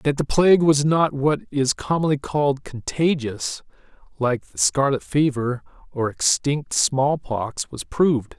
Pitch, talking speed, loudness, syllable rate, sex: 140 Hz, 145 wpm, -21 LUFS, 4.0 syllables/s, male